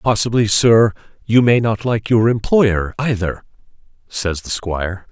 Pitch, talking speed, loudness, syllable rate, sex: 110 Hz, 140 wpm, -16 LUFS, 4.2 syllables/s, male